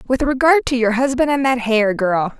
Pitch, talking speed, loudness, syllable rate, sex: 245 Hz, 225 wpm, -16 LUFS, 5.1 syllables/s, female